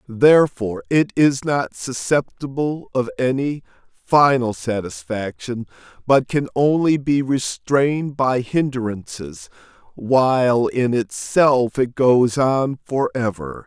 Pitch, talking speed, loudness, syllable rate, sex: 130 Hz, 105 wpm, -19 LUFS, 3.6 syllables/s, male